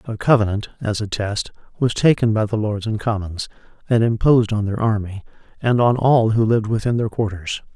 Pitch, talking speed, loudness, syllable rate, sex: 110 Hz, 195 wpm, -19 LUFS, 5.5 syllables/s, male